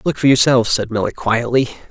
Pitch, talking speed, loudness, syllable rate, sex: 120 Hz, 190 wpm, -16 LUFS, 6.3 syllables/s, male